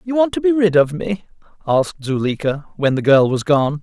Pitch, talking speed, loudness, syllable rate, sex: 165 Hz, 220 wpm, -17 LUFS, 5.2 syllables/s, male